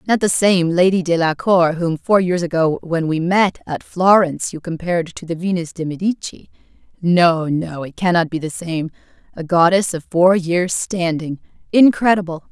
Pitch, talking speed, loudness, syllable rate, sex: 175 Hz, 155 wpm, -17 LUFS, 4.7 syllables/s, female